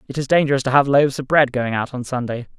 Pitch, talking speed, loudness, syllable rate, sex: 135 Hz, 280 wpm, -18 LUFS, 6.8 syllables/s, male